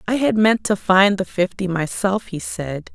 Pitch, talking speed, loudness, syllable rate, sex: 195 Hz, 205 wpm, -19 LUFS, 4.3 syllables/s, female